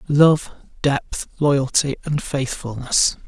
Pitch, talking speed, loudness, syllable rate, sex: 140 Hz, 90 wpm, -20 LUFS, 3.1 syllables/s, male